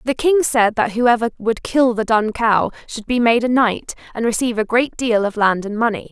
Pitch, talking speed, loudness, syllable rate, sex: 230 Hz, 235 wpm, -17 LUFS, 5.0 syllables/s, female